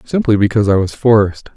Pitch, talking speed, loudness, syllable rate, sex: 105 Hz, 190 wpm, -13 LUFS, 6.3 syllables/s, male